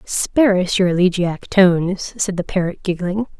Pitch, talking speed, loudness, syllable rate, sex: 185 Hz, 160 wpm, -17 LUFS, 4.7 syllables/s, female